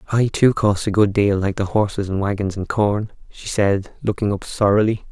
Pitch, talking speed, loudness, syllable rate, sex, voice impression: 100 Hz, 210 wpm, -19 LUFS, 5.1 syllables/s, male, very masculine, very adult-like, slightly middle-aged, thick, relaxed, very weak, dark, very soft, muffled, slightly halting, slightly raspy, cool, very intellectual, slightly refreshing, very sincere, very calm, friendly, reassuring, slightly unique, elegant, slightly wild, sweet, slightly lively, very kind, very modest, slightly light